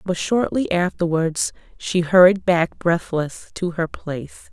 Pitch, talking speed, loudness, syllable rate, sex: 175 Hz, 135 wpm, -20 LUFS, 4.1 syllables/s, female